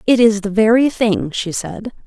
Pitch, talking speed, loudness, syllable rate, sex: 210 Hz, 205 wpm, -16 LUFS, 4.4 syllables/s, female